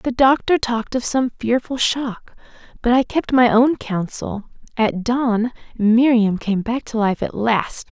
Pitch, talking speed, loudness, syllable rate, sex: 235 Hz, 165 wpm, -19 LUFS, 4.0 syllables/s, female